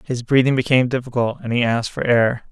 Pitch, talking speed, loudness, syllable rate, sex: 125 Hz, 215 wpm, -18 LUFS, 6.4 syllables/s, male